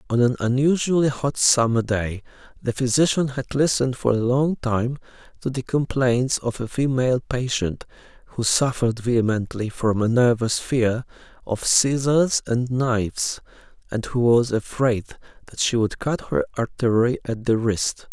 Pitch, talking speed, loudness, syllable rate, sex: 125 Hz, 150 wpm, -22 LUFS, 4.5 syllables/s, male